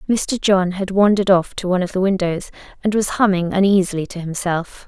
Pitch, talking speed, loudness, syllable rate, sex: 190 Hz, 195 wpm, -18 LUFS, 5.7 syllables/s, female